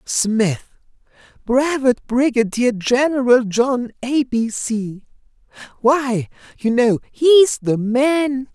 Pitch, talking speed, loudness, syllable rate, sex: 245 Hz, 90 wpm, -17 LUFS, 3.0 syllables/s, male